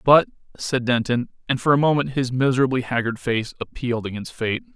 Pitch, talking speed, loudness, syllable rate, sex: 130 Hz, 175 wpm, -22 LUFS, 5.7 syllables/s, male